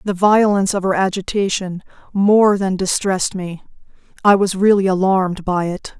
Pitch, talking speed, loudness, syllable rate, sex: 190 Hz, 140 wpm, -16 LUFS, 5.0 syllables/s, female